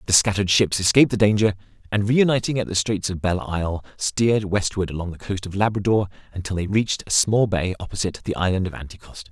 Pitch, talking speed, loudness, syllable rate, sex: 100 Hz, 205 wpm, -21 LUFS, 6.6 syllables/s, male